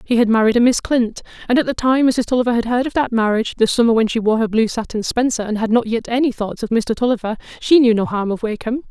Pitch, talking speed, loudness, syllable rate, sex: 235 Hz, 275 wpm, -17 LUFS, 6.5 syllables/s, female